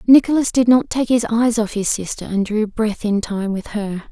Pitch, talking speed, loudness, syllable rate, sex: 220 Hz, 235 wpm, -18 LUFS, 4.9 syllables/s, female